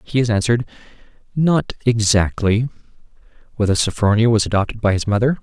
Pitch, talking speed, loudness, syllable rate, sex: 115 Hz, 135 wpm, -18 LUFS, 6.0 syllables/s, male